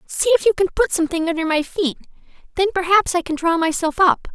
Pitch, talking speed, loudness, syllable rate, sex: 345 Hz, 220 wpm, -18 LUFS, 6.1 syllables/s, female